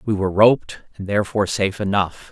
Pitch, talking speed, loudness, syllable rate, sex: 100 Hz, 180 wpm, -19 LUFS, 6.8 syllables/s, male